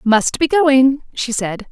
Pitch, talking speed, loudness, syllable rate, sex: 260 Hz, 175 wpm, -15 LUFS, 3.3 syllables/s, female